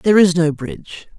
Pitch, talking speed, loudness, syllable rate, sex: 170 Hz, 200 wpm, -15 LUFS, 5.6 syllables/s, male